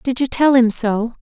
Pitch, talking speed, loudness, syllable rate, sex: 245 Hz, 245 wpm, -16 LUFS, 4.4 syllables/s, female